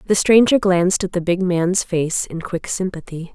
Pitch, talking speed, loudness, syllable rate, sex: 180 Hz, 195 wpm, -18 LUFS, 4.7 syllables/s, female